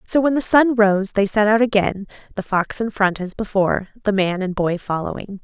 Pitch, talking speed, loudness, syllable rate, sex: 205 Hz, 220 wpm, -19 LUFS, 5.2 syllables/s, female